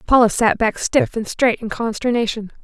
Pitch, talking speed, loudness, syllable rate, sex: 230 Hz, 180 wpm, -18 LUFS, 5.0 syllables/s, female